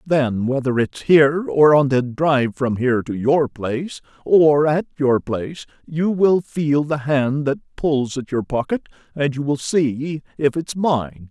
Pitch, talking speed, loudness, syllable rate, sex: 140 Hz, 180 wpm, -19 LUFS, 4.0 syllables/s, male